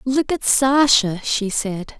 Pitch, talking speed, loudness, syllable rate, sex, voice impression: 240 Hz, 150 wpm, -18 LUFS, 3.3 syllables/s, female, very feminine, slightly young, slightly adult-like, thin, relaxed, very weak, dark, very soft, slightly muffled, slightly fluent, raspy, very cute, intellectual, slightly refreshing, sincere, very calm, very friendly, reassuring, very unique, elegant, slightly wild, very sweet, kind, very modest